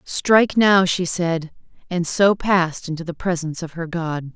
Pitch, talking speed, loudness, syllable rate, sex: 175 Hz, 180 wpm, -19 LUFS, 4.6 syllables/s, female